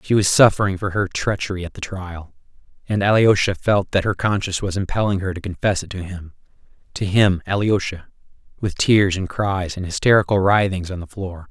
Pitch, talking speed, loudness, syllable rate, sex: 95 Hz, 190 wpm, -19 LUFS, 5.4 syllables/s, male